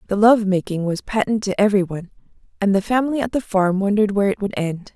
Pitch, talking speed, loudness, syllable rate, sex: 200 Hz, 230 wpm, -19 LUFS, 6.8 syllables/s, female